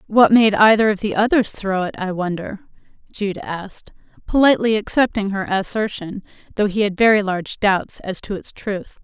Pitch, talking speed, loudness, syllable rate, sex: 205 Hz, 175 wpm, -18 LUFS, 5.1 syllables/s, female